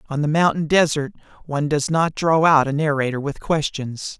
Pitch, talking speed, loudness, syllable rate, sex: 150 Hz, 185 wpm, -20 LUFS, 5.2 syllables/s, male